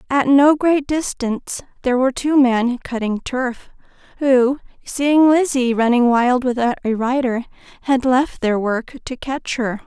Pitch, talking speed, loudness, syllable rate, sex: 255 Hz, 150 wpm, -18 LUFS, 4.3 syllables/s, female